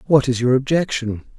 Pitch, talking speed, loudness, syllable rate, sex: 130 Hz, 175 wpm, -19 LUFS, 5.3 syllables/s, male